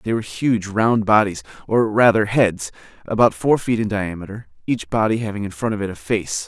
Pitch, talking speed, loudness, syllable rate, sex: 105 Hz, 185 wpm, -19 LUFS, 5.3 syllables/s, male